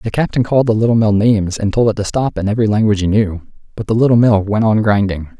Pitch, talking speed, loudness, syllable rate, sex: 110 Hz, 265 wpm, -14 LUFS, 6.8 syllables/s, male